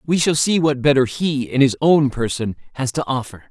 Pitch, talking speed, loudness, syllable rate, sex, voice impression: 135 Hz, 225 wpm, -18 LUFS, 5.2 syllables/s, male, masculine, slightly young, slightly adult-like, slightly thick, very tensed, powerful, very bright, hard, very clear, fluent, cool, slightly intellectual, very refreshing, very sincere, slightly calm, very friendly, very reassuring, unique, wild, slightly sweet, very lively, kind, intense, very light